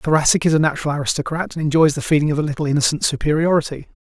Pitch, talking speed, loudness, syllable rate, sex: 150 Hz, 225 wpm, -18 LUFS, 8.0 syllables/s, male